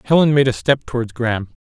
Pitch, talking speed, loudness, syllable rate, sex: 125 Hz, 220 wpm, -17 LUFS, 6.3 syllables/s, male